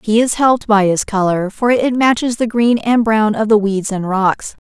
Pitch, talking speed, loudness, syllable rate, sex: 215 Hz, 230 wpm, -14 LUFS, 4.7 syllables/s, female